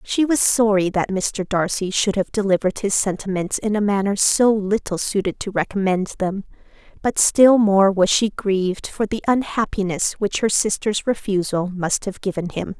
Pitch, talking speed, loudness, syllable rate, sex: 200 Hz, 175 wpm, -19 LUFS, 4.7 syllables/s, female